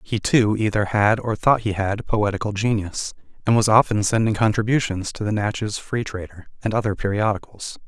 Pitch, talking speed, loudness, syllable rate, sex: 105 Hz, 175 wpm, -21 LUFS, 5.3 syllables/s, male